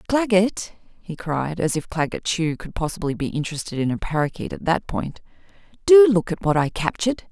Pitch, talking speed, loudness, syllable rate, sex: 180 Hz, 190 wpm, -21 LUFS, 5.4 syllables/s, female